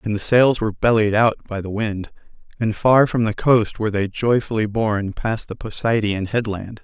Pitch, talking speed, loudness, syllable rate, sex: 110 Hz, 195 wpm, -19 LUFS, 5.0 syllables/s, male